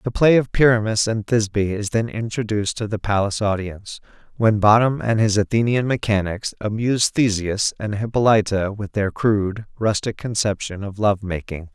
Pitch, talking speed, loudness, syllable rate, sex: 105 Hz, 160 wpm, -20 LUFS, 5.2 syllables/s, male